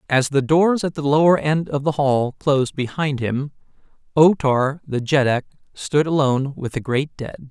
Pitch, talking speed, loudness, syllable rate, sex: 145 Hz, 185 wpm, -19 LUFS, 4.5 syllables/s, male